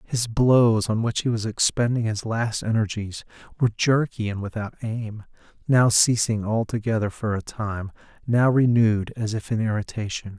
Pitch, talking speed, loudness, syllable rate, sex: 110 Hz, 155 wpm, -23 LUFS, 4.7 syllables/s, male